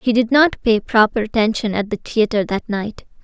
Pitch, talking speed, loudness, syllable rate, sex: 225 Hz, 205 wpm, -17 LUFS, 5.1 syllables/s, female